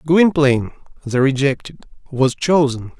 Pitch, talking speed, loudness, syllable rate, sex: 140 Hz, 100 wpm, -17 LUFS, 4.5 syllables/s, male